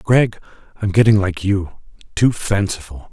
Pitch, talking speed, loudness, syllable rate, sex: 100 Hz, 115 wpm, -18 LUFS, 4.4 syllables/s, male